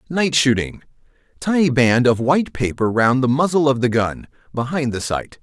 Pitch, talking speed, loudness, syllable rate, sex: 130 Hz, 175 wpm, -18 LUFS, 5.0 syllables/s, male